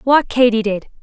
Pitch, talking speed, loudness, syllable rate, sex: 230 Hz, 175 wpm, -15 LUFS, 4.8 syllables/s, female